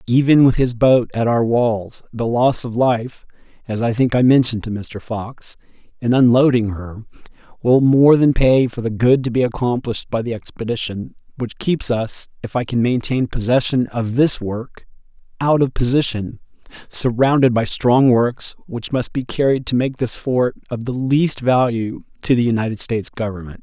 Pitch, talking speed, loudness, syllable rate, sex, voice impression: 120 Hz, 180 wpm, -18 LUFS, 4.4 syllables/s, male, very masculine, adult-like, thick, slightly tensed, slightly powerful, bright, slightly hard, clear, fluent, slightly raspy, cool, intellectual, refreshing, slightly sincere, calm, slightly mature, friendly, reassuring, slightly unique, slightly elegant, wild, slightly sweet, lively, kind, slightly modest